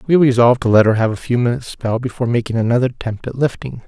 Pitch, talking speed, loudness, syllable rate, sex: 120 Hz, 250 wpm, -16 LUFS, 7.3 syllables/s, male